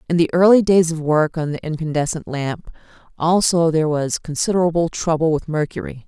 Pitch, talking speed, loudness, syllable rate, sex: 160 Hz, 170 wpm, -18 LUFS, 5.6 syllables/s, female